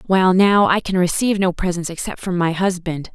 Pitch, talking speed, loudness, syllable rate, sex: 180 Hz, 210 wpm, -18 LUFS, 5.7 syllables/s, female